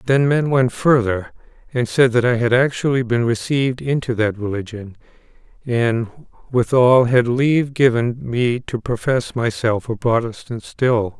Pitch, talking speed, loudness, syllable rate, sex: 120 Hz, 145 wpm, -18 LUFS, 4.3 syllables/s, male